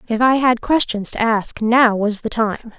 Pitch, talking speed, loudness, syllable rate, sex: 230 Hz, 215 wpm, -17 LUFS, 4.3 syllables/s, female